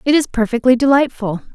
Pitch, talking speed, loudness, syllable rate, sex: 250 Hz, 155 wpm, -15 LUFS, 5.9 syllables/s, female